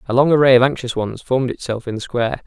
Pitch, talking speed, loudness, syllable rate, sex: 125 Hz, 265 wpm, -17 LUFS, 7.0 syllables/s, male